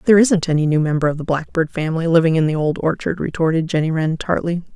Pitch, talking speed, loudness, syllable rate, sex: 165 Hz, 225 wpm, -18 LUFS, 6.6 syllables/s, female